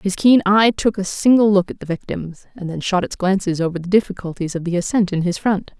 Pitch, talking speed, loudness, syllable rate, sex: 190 Hz, 250 wpm, -18 LUFS, 5.8 syllables/s, female